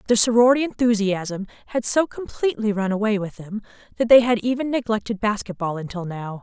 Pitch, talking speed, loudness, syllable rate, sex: 215 Hz, 170 wpm, -21 LUFS, 5.9 syllables/s, female